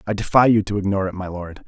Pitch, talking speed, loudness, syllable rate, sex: 100 Hz, 285 wpm, -19 LUFS, 7.4 syllables/s, male